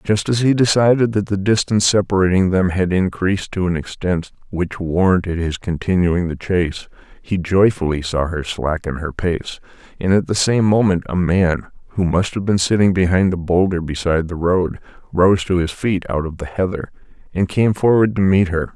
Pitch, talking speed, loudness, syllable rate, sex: 90 Hz, 190 wpm, -18 LUFS, 5.1 syllables/s, male